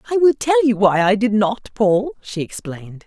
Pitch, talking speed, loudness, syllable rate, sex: 210 Hz, 215 wpm, -17 LUFS, 4.9 syllables/s, female